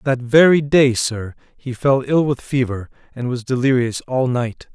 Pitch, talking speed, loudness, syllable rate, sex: 130 Hz, 175 wpm, -17 LUFS, 4.3 syllables/s, male